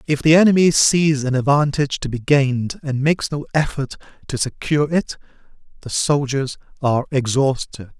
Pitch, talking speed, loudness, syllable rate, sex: 140 Hz, 150 wpm, -18 LUFS, 5.3 syllables/s, male